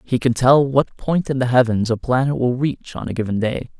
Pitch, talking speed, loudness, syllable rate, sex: 125 Hz, 255 wpm, -19 LUFS, 5.2 syllables/s, male